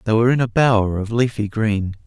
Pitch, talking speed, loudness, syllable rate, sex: 110 Hz, 230 wpm, -18 LUFS, 6.0 syllables/s, male